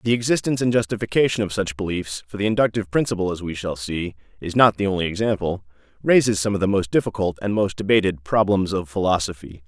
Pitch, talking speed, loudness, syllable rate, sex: 100 Hz, 185 wpm, -21 LUFS, 6.4 syllables/s, male